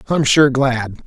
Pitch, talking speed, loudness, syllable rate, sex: 130 Hz, 170 wpm, -15 LUFS, 3.7 syllables/s, male